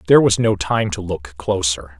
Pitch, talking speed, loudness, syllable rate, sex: 95 Hz, 210 wpm, -18 LUFS, 5.1 syllables/s, male